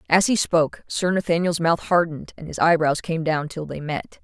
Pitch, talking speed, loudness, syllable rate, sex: 165 Hz, 215 wpm, -22 LUFS, 5.3 syllables/s, female